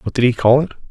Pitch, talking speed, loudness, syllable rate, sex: 130 Hz, 330 wpm, -15 LUFS, 7.8 syllables/s, male